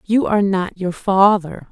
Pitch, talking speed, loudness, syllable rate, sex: 195 Hz, 175 wpm, -17 LUFS, 4.4 syllables/s, female